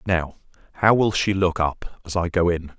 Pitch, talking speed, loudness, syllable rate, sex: 90 Hz, 215 wpm, -21 LUFS, 4.7 syllables/s, male